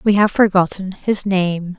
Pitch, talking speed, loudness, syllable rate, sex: 190 Hz, 170 wpm, -17 LUFS, 4.1 syllables/s, female